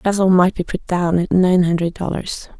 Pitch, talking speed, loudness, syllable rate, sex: 180 Hz, 210 wpm, -17 LUFS, 4.9 syllables/s, female